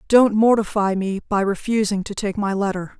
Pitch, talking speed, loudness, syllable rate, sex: 205 Hz, 180 wpm, -20 LUFS, 5.1 syllables/s, female